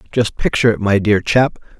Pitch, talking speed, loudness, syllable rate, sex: 105 Hz, 200 wpm, -16 LUFS, 5.8 syllables/s, male